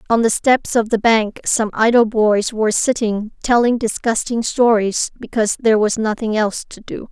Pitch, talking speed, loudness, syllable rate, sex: 225 Hz, 175 wpm, -17 LUFS, 5.0 syllables/s, female